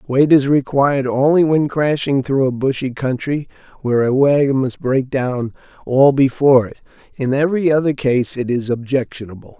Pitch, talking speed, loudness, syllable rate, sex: 135 Hz, 165 wpm, -16 LUFS, 5.1 syllables/s, male